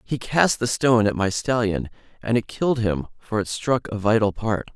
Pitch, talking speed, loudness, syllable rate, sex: 110 Hz, 215 wpm, -22 LUFS, 5.0 syllables/s, male